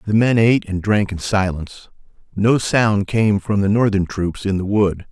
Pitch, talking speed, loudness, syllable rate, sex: 100 Hz, 200 wpm, -18 LUFS, 4.7 syllables/s, male